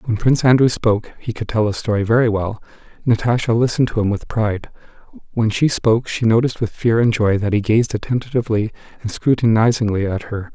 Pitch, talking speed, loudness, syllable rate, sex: 110 Hz, 195 wpm, -18 LUFS, 5.5 syllables/s, male